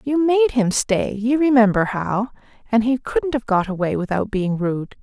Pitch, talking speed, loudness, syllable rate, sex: 230 Hz, 165 wpm, -19 LUFS, 4.6 syllables/s, female